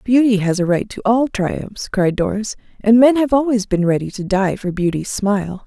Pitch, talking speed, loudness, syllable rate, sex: 210 Hz, 210 wpm, -17 LUFS, 4.9 syllables/s, female